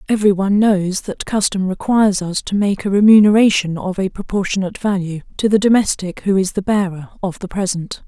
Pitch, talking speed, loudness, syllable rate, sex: 195 Hz, 185 wpm, -16 LUFS, 5.8 syllables/s, female